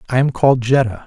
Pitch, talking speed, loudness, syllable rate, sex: 130 Hz, 225 wpm, -15 LUFS, 6.7 syllables/s, male